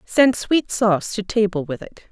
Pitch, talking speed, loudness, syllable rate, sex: 205 Hz, 200 wpm, -20 LUFS, 4.7 syllables/s, female